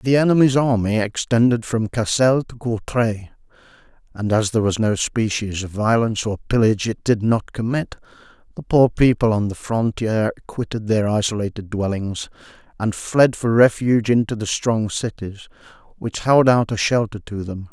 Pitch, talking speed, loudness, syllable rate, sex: 110 Hz, 160 wpm, -19 LUFS, 4.9 syllables/s, male